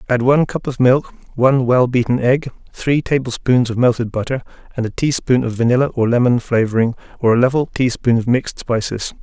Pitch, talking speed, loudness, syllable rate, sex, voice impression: 125 Hz, 190 wpm, -17 LUFS, 5.8 syllables/s, male, very masculine, very middle-aged, very thick, tensed, powerful, slightly dark, slightly soft, clear, fluent, slightly cool, intellectual, slightly refreshing, very sincere, calm, mature, friendly, reassuring, slightly unique, elegant, wild, sweet, slightly lively, kind, slightly modest